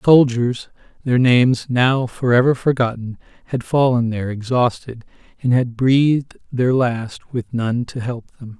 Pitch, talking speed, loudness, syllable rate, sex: 125 Hz, 145 wpm, -18 LUFS, 4.3 syllables/s, male